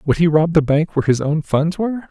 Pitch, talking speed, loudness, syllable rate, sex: 160 Hz, 285 wpm, -17 LUFS, 6.0 syllables/s, male